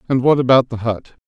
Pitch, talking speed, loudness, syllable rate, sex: 125 Hz, 235 wpm, -16 LUFS, 6.0 syllables/s, male